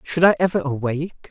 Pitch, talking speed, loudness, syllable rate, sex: 155 Hz, 185 wpm, -20 LUFS, 6.0 syllables/s, male